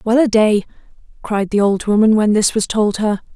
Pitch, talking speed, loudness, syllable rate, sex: 215 Hz, 215 wpm, -15 LUFS, 5.0 syllables/s, female